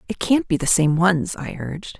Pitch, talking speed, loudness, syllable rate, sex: 170 Hz, 240 wpm, -20 LUFS, 5.0 syllables/s, female